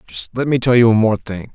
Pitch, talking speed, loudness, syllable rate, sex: 110 Hz, 310 wpm, -15 LUFS, 6.5 syllables/s, male